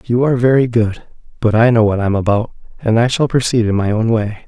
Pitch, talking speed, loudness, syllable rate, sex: 115 Hz, 255 wpm, -15 LUFS, 6.1 syllables/s, male